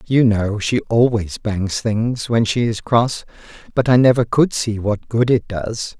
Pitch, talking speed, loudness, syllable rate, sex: 115 Hz, 190 wpm, -18 LUFS, 3.9 syllables/s, male